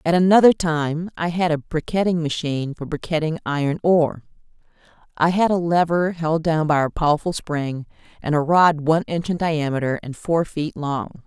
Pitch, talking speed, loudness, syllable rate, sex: 160 Hz, 175 wpm, -20 LUFS, 5.2 syllables/s, female